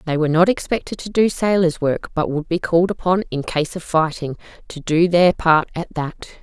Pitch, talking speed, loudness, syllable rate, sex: 170 Hz, 215 wpm, -19 LUFS, 5.3 syllables/s, female